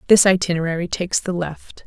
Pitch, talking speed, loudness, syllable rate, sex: 180 Hz, 160 wpm, -19 LUFS, 6.0 syllables/s, female